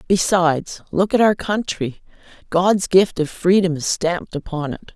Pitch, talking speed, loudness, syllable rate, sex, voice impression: 180 Hz, 160 wpm, -19 LUFS, 4.5 syllables/s, female, slightly feminine, adult-like, slightly powerful, slightly unique